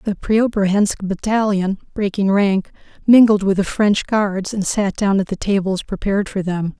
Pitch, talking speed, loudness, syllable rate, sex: 200 Hz, 170 wpm, -18 LUFS, 4.6 syllables/s, female